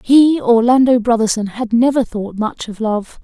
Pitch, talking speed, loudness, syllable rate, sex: 235 Hz, 165 wpm, -15 LUFS, 4.5 syllables/s, female